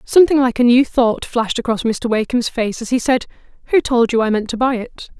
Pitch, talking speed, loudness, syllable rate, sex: 240 Hz, 245 wpm, -16 LUFS, 5.7 syllables/s, female